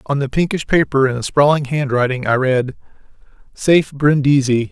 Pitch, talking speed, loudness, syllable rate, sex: 140 Hz, 155 wpm, -16 LUFS, 5.2 syllables/s, male